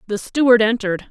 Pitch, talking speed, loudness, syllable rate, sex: 225 Hz, 160 wpm, -16 LUFS, 6.3 syllables/s, female